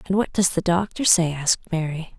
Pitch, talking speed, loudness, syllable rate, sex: 175 Hz, 220 wpm, -21 LUFS, 5.6 syllables/s, female